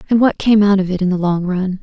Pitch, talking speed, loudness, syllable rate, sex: 195 Hz, 330 wpm, -15 LUFS, 6.1 syllables/s, female